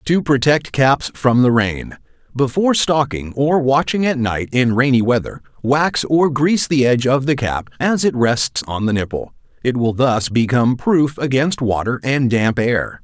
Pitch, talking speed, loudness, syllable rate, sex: 130 Hz, 175 wpm, -17 LUFS, 4.5 syllables/s, male